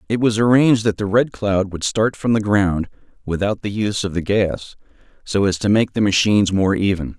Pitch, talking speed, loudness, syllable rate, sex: 105 Hz, 215 wpm, -18 LUFS, 5.3 syllables/s, male